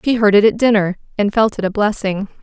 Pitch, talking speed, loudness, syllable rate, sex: 210 Hz, 245 wpm, -15 LUFS, 5.9 syllables/s, female